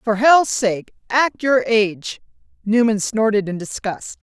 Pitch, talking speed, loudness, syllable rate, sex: 220 Hz, 140 wpm, -18 LUFS, 4.0 syllables/s, female